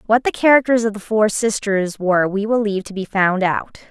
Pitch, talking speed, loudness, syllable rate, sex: 210 Hz, 230 wpm, -18 LUFS, 5.5 syllables/s, female